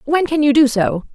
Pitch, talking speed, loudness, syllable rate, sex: 275 Hz, 260 wpm, -15 LUFS, 5.2 syllables/s, female